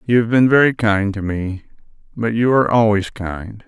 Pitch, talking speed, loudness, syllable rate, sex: 110 Hz, 195 wpm, -17 LUFS, 4.9 syllables/s, male